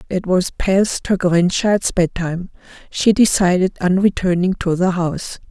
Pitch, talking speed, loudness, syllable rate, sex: 185 Hz, 140 wpm, -17 LUFS, 4.4 syllables/s, female